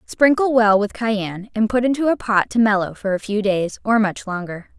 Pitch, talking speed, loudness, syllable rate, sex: 215 Hz, 225 wpm, -19 LUFS, 5.1 syllables/s, female